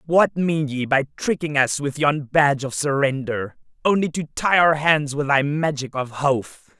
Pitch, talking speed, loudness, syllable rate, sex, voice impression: 145 Hz, 185 wpm, -20 LUFS, 4.5 syllables/s, male, very masculine, very middle-aged, very thick, tensed, very powerful, dark, very hard, slightly clear, slightly fluent, cool, very intellectual, sincere, very calm, slightly friendly, slightly reassuring, very unique, elegant, wild, slightly sweet, slightly lively, very strict, slightly intense